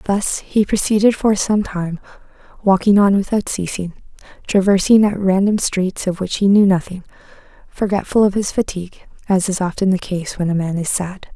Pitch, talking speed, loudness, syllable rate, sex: 195 Hz, 175 wpm, -17 LUFS, 5.1 syllables/s, female